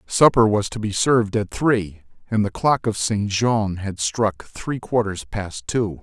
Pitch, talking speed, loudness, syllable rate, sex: 105 Hz, 190 wpm, -21 LUFS, 3.9 syllables/s, male